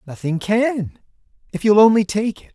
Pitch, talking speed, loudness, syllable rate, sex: 200 Hz, 140 wpm, -17 LUFS, 4.8 syllables/s, male